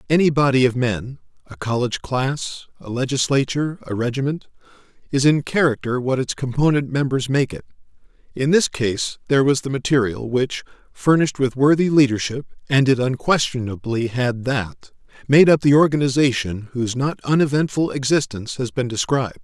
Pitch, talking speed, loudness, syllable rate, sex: 130 Hz, 135 wpm, -19 LUFS, 5.3 syllables/s, male